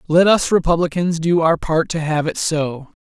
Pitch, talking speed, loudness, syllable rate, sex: 165 Hz, 200 wpm, -17 LUFS, 4.6 syllables/s, male